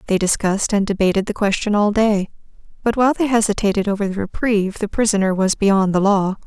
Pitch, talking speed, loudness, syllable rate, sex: 205 Hz, 195 wpm, -18 LUFS, 6.1 syllables/s, female